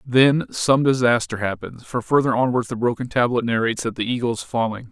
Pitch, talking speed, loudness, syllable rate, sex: 120 Hz, 195 wpm, -20 LUFS, 5.7 syllables/s, male